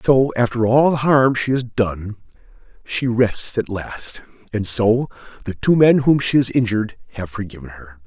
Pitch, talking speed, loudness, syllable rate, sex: 115 Hz, 180 wpm, -18 LUFS, 4.6 syllables/s, male